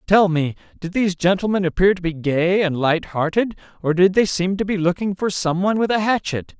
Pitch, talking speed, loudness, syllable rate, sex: 180 Hz, 210 wpm, -19 LUFS, 5.6 syllables/s, male